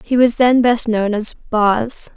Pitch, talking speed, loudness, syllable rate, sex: 230 Hz, 195 wpm, -16 LUFS, 3.7 syllables/s, female